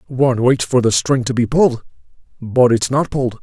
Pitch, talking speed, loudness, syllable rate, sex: 125 Hz, 210 wpm, -16 LUFS, 5.6 syllables/s, male